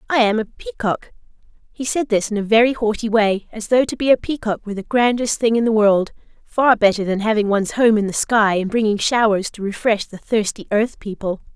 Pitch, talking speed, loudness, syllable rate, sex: 220 Hz, 225 wpm, -18 LUFS, 5.5 syllables/s, female